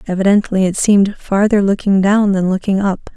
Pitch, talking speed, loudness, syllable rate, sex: 195 Hz, 170 wpm, -14 LUFS, 5.4 syllables/s, female